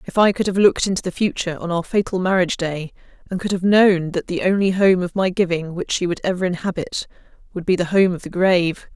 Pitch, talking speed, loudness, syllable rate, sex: 180 Hz, 240 wpm, -19 LUFS, 6.2 syllables/s, female